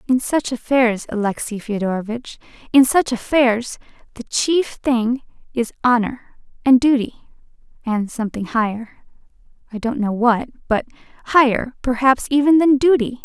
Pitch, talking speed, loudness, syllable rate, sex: 245 Hz, 120 wpm, -18 LUFS, 4.5 syllables/s, female